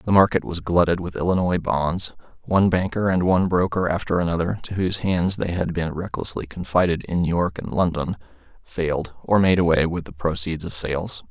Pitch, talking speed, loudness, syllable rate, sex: 85 Hz, 190 wpm, -22 LUFS, 5.4 syllables/s, male